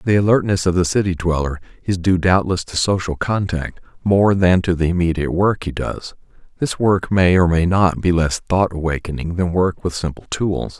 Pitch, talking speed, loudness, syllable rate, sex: 90 Hz, 195 wpm, -18 LUFS, 5.1 syllables/s, male